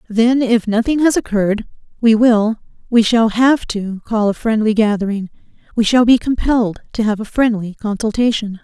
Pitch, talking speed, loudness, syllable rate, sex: 220 Hz, 165 wpm, -16 LUFS, 5.0 syllables/s, female